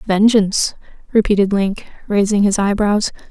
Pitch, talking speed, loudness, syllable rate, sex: 205 Hz, 110 wpm, -16 LUFS, 4.8 syllables/s, female